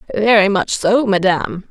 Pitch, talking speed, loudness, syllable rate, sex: 200 Hz, 140 wpm, -15 LUFS, 5.0 syllables/s, female